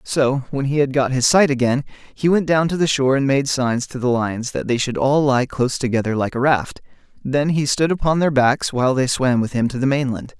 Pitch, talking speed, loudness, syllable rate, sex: 135 Hz, 255 wpm, -18 LUFS, 5.4 syllables/s, male